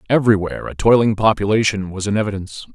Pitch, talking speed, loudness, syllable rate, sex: 105 Hz, 155 wpm, -17 LUFS, 7.1 syllables/s, male